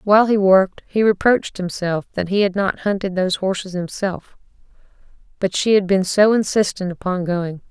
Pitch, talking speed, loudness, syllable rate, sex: 190 Hz, 170 wpm, -18 LUFS, 5.3 syllables/s, female